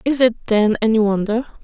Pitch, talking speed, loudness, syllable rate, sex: 225 Hz, 185 wpm, -17 LUFS, 5.2 syllables/s, female